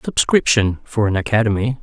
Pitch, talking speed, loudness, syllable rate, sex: 110 Hz, 130 wpm, -17 LUFS, 5.4 syllables/s, male